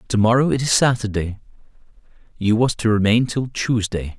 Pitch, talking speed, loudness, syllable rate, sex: 110 Hz, 130 wpm, -19 LUFS, 4.9 syllables/s, male